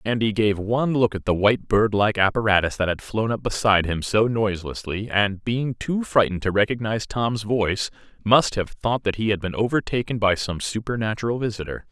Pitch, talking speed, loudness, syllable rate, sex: 110 Hz, 190 wpm, -22 LUFS, 5.6 syllables/s, male